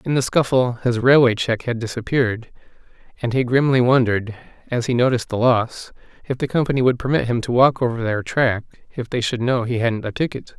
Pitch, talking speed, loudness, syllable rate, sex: 125 Hz, 205 wpm, -19 LUFS, 5.7 syllables/s, male